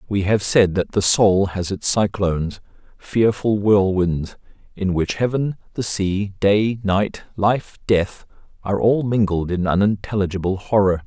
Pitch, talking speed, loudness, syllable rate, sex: 100 Hz, 135 wpm, -19 LUFS, 4.2 syllables/s, male